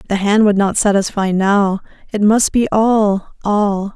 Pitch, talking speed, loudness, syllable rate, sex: 205 Hz, 165 wpm, -15 LUFS, 3.9 syllables/s, female